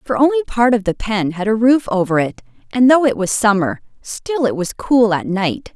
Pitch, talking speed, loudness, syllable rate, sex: 220 Hz, 230 wpm, -16 LUFS, 5.1 syllables/s, female